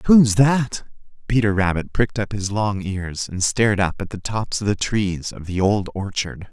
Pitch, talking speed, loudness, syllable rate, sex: 100 Hz, 200 wpm, -21 LUFS, 4.6 syllables/s, male